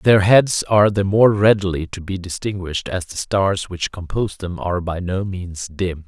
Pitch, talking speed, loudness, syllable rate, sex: 95 Hz, 195 wpm, -19 LUFS, 4.8 syllables/s, male